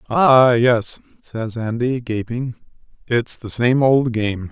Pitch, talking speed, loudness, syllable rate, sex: 120 Hz, 135 wpm, -18 LUFS, 3.4 syllables/s, male